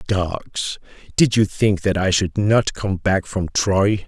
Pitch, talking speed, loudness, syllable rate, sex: 100 Hz, 175 wpm, -19 LUFS, 3.4 syllables/s, male